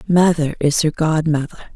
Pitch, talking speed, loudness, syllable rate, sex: 155 Hz, 135 wpm, -17 LUFS, 5.0 syllables/s, female